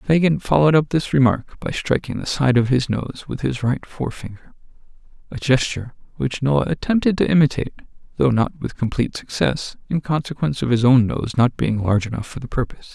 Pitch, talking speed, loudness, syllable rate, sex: 130 Hz, 185 wpm, -20 LUFS, 5.8 syllables/s, male